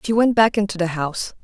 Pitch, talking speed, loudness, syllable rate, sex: 195 Hz, 250 wpm, -19 LUFS, 6.5 syllables/s, female